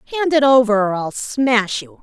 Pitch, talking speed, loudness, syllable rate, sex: 230 Hz, 205 wpm, -16 LUFS, 4.8 syllables/s, female